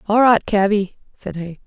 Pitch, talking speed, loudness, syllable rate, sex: 200 Hz, 180 wpm, -17 LUFS, 4.6 syllables/s, female